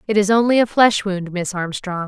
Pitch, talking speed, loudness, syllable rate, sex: 200 Hz, 230 wpm, -18 LUFS, 5.1 syllables/s, female